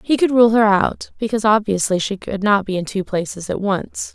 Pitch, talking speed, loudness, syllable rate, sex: 205 Hz, 230 wpm, -18 LUFS, 5.3 syllables/s, female